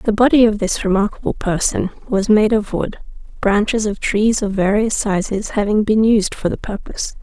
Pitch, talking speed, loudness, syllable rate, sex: 210 Hz, 185 wpm, -17 LUFS, 5.0 syllables/s, female